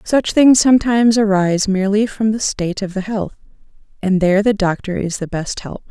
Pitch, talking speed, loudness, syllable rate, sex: 205 Hz, 195 wpm, -16 LUFS, 5.7 syllables/s, female